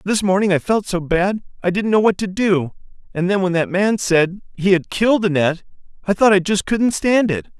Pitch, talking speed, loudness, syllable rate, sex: 190 Hz, 220 wpm, -17 LUFS, 5.4 syllables/s, male